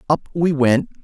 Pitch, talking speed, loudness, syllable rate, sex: 145 Hz, 175 wpm, -18 LUFS, 4.4 syllables/s, male